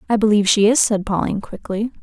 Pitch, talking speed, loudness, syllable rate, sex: 210 Hz, 205 wpm, -17 LUFS, 6.8 syllables/s, female